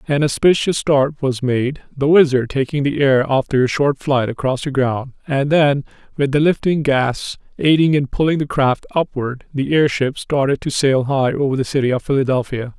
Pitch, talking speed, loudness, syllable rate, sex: 140 Hz, 190 wpm, -17 LUFS, 4.9 syllables/s, male